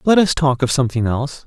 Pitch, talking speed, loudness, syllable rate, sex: 140 Hz, 245 wpm, -17 LUFS, 6.6 syllables/s, male